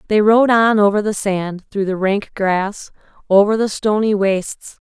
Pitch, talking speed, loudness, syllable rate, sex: 205 Hz, 170 wpm, -16 LUFS, 4.3 syllables/s, female